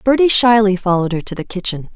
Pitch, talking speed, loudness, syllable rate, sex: 200 Hz, 215 wpm, -15 LUFS, 6.6 syllables/s, female